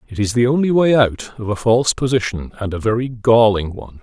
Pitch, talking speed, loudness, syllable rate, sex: 115 Hz, 225 wpm, -17 LUFS, 5.9 syllables/s, male